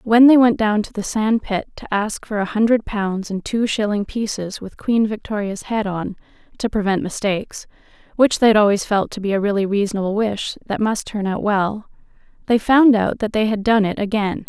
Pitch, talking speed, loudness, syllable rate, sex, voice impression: 210 Hz, 215 wpm, -19 LUFS, 5.3 syllables/s, female, very feminine, slightly young, slightly adult-like, thin, slightly tensed, slightly weak, slightly bright, slightly hard, clear, slightly fluent, cute, intellectual, refreshing, sincere, very calm, friendly, reassuring, elegant, slightly wild, slightly sweet, kind, modest